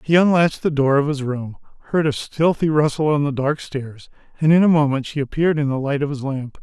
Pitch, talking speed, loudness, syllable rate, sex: 145 Hz, 245 wpm, -19 LUFS, 5.8 syllables/s, male